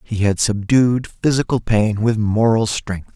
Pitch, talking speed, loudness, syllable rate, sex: 110 Hz, 150 wpm, -17 LUFS, 4.0 syllables/s, male